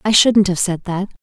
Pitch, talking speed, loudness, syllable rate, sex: 190 Hz, 245 wpm, -16 LUFS, 4.7 syllables/s, female